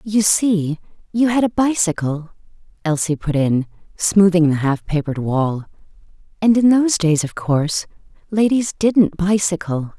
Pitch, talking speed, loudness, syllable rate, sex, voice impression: 180 Hz, 140 wpm, -18 LUFS, 4.5 syllables/s, female, slightly feminine, very gender-neutral, very middle-aged, slightly old, slightly thin, slightly relaxed, slightly dark, very soft, clear, fluent, very intellectual, very sincere, very calm, mature, friendly, very reassuring, elegant, slightly sweet, kind, slightly modest